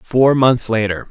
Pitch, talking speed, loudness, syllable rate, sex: 120 Hz, 160 wpm, -15 LUFS, 3.8 syllables/s, male